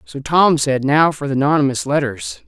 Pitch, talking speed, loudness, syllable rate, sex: 145 Hz, 195 wpm, -16 LUFS, 4.7 syllables/s, male